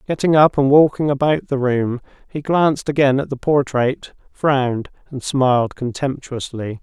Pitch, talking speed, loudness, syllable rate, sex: 135 Hz, 150 wpm, -18 LUFS, 4.6 syllables/s, male